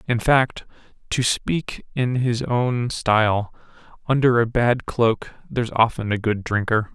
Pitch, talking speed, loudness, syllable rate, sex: 120 Hz, 145 wpm, -21 LUFS, 3.9 syllables/s, male